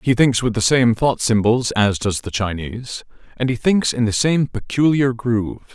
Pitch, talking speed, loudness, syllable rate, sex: 120 Hz, 200 wpm, -18 LUFS, 4.8 syllables/s, male